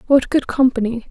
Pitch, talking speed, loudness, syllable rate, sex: 250 Hz, 160 wpm, -17 LUFS, 5.5 syllables/s, female